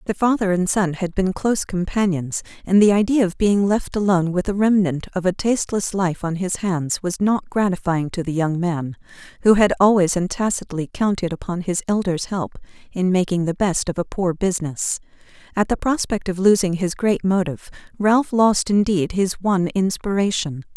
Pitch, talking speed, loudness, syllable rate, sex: 190 Hz, 185 wpm, -20 LUFS, 5.1 syllables/s, female